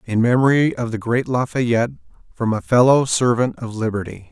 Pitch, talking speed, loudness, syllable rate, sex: 120 Hz, 165 wpm, -18 LUFS, 5.3 syllables/s, male